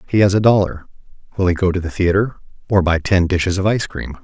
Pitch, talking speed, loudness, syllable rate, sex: 95 Hz, 240 wpm, -17 LUFS, 6.7 syllables/s, male